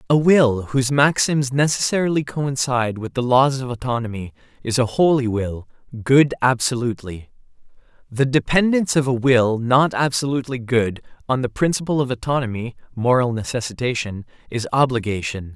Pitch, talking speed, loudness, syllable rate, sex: 125 Hz, 130 wpm, -19 LUFS, 5.1 syllables/s, male